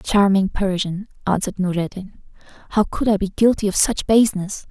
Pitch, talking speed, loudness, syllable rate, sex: 195 Hz, 155 wpm, -19 LUFS, 5.4 syllables/s, female